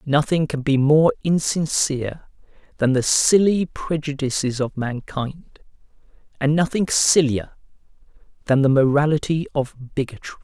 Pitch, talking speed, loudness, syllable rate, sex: 145 Hz, 110 wpm, -20 LUFS, 4.4 syllables/s, male